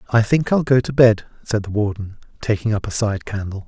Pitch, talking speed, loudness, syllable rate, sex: 110 Hz, 230 wpm, -19 LUFS, 5.5 syllables/s, male